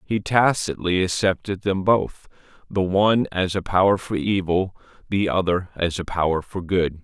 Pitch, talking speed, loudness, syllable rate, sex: 95 Hz, 160 wpm, -22 LUFS, 4.6 syllables/s, male